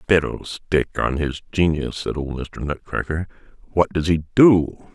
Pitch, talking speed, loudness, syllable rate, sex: 80 Hz, 145 wpm, -21 LUFS, 4.3 syllables/s, male